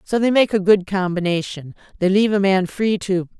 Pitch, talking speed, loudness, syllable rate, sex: 190 Hz, 210 wpm, -18 LUFS, 5.5 syllables/s, female